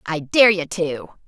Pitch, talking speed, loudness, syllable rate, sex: 170 Hz, 190 wpm, -18 LUFS, 4.1 syllables/s, female